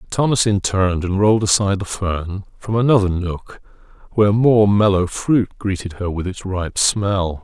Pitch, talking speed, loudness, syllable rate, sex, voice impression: 100 Hz, 160 wpm, -18 LUFS, 4.7 syllables/s, male, masculine, middle-aged, tensed, slightly powerful, hard, clear, cool, slightly unique, wild, lively, strict, slightly intense, slightly sharp